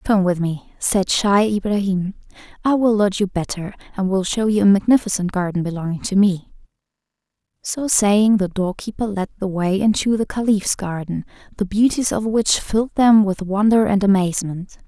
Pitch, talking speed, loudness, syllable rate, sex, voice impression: 200 Hz, 170 wpm, -19 LUFS, 5.1 syllables/s, female, feminine, slightly young, slightly relaxed, slightly powerful, bright, soft, raspy, slightly cute, calm, friendly, reassuring, elegant, kind, modest